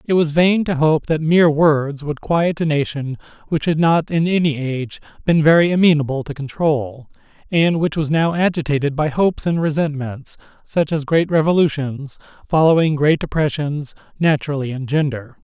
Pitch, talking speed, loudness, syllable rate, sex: 150 Hz, 160 wpm, -18 LUFS, 5.0 syllables/s, male